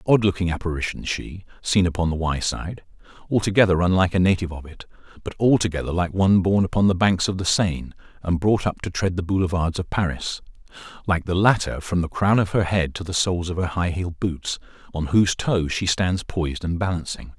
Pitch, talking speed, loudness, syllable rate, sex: 90 Hz, 200 wpm, -22 LUFS, 6.0 syllables/s, male